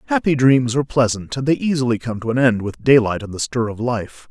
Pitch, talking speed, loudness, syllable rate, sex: 125 Hz, 250 wpm, -18 LUFS, 5.8 syllables/s, male